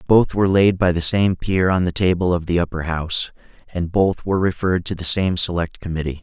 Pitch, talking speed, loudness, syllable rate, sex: 90 Hz, 220 wpm, -19 LUFS, 5.8 syllables/s, male